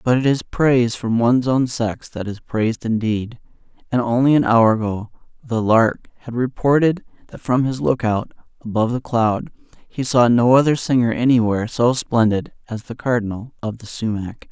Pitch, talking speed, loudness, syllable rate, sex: 120 Hz, 170 wpm, -19 LUFS, 5.0 syllables/s, male